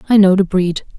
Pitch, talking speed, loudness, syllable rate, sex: 190 Hz, 245 wpm, -14 LUFS, 5.6 syllables/s, female